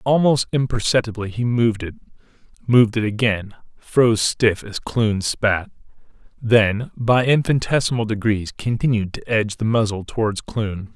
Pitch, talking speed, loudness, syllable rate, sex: 110 Hz, 130 wpm, -20 LUFS, 4.9 syllables/s, male